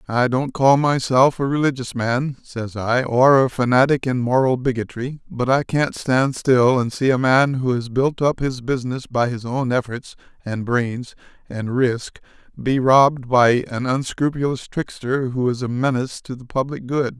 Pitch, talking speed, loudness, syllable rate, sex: 130 Hz, 180 wpm, -19 LUFS, 4.5 syllables/s, male